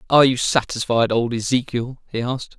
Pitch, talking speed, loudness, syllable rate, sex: 120 Hz, 165 wpm, -20 LUFS, 5.6 syllables/s, male